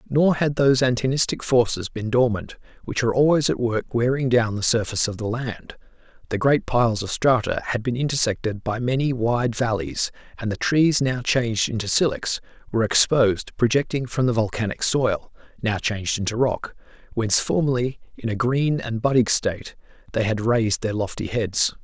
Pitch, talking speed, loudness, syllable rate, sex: 120 Hz, 175 wpm, -22 LUFS, 5.4 syllables/s, male